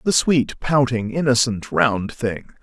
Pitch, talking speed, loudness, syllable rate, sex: 125 Hz, 135 wpm, -20 LUFS, 3.8 syllables/s, male